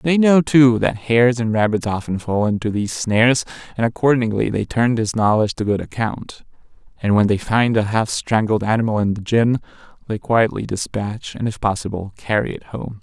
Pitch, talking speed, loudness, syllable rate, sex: 110 Hz, 190 wpm, -18 LUFS, 5.3 syllables/s, male